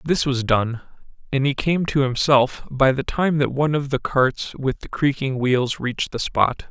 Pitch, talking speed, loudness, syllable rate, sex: 135 Hz, 205 wpm, -21 LUFS, 4.4 syllables/s, male